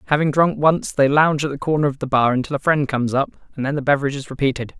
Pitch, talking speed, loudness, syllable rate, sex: 140 Hz, 275 wpm, -19 LUFS, 7.1 syllables/s, male